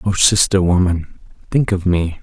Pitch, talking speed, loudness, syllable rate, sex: 95 Hz, 160 wpm, -16 LUFS, 4.4 syllables/s, male